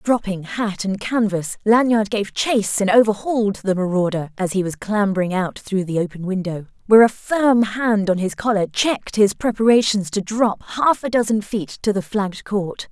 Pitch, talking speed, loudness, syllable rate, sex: 205 Hz, 185 wpm, -19 LUFS, 4.9 syllables/s, female